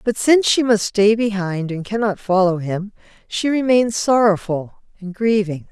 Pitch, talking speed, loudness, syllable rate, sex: 205 Hz, 160 wpm, -18 LUFS, 4.6 syllables/s, female